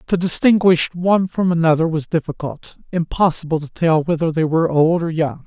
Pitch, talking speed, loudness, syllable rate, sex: 165 Hz, 175 wpm, -17 LUFS, 5.4 syllables/s, male